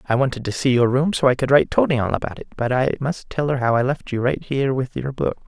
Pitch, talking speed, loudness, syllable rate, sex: 125 Hz, 305 wpm, -20 LUFS, 6.5 syllables/s, male